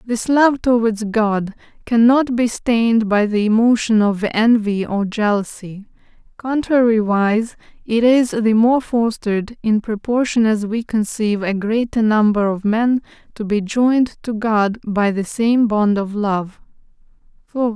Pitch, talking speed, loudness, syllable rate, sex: 220 Hz, 140 wpm, -17 LUFS, 4.1 syllables/s, female